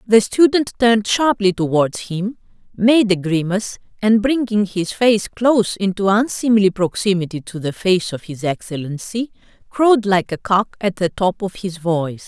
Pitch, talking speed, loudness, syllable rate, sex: 200 Hz, 160 wpm, -18 LUFS, 4.8 syllables/s, female